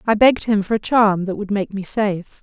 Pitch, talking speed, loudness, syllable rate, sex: 205 Hz, 270 wpm, -18 LUFS, 5.7 syllables/s, female